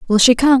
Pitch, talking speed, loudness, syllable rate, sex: 245 Hz, 300 wpm, -12 LUFS, 6.5 syllables/s, female